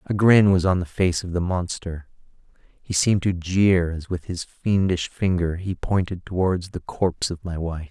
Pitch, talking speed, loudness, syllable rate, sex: 90 Hz, 195 wpm, -22 LUFS, 4.6 syllables/s, male